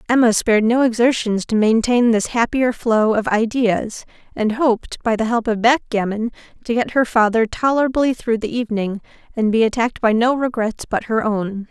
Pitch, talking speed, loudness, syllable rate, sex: 230 Hz, 180 wpm, -18 LUFS, 5.1 syllables/s, female